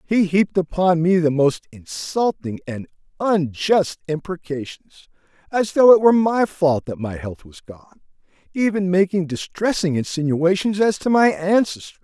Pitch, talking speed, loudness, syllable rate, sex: 175 Hz, 145 wpm, -19 LUFS, 4.5 syllables/s, male